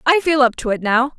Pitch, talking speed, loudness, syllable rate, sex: 265 Hz, 305 wpm, -17 LUFS, 5.7 syllables/s, female